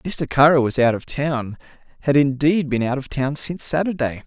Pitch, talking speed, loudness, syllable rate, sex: 140 Hz, 195 wpm, -20 LUFS, 5.2 syllables/s, male